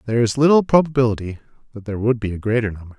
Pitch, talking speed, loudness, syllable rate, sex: 115 Hz, 220 wpm, -19 LUFS, 7.9 syllables/s, male